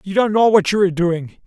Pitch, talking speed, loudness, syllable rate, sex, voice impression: 190 Hz, 285 wpm, -16 LUFS, 6.0 syllables/s, male, very masculine, very adult-like, slightly old, thick, slightly relaxed, slightly powerful, slightly dark, hard, slightly muffled, slightly halting, slightly raspy, slightly cool, intellectual, sincere, slightly calm, mature, slightly friendly, slightly reassuring, slightly unique, elegant, slightly wild, kind, modest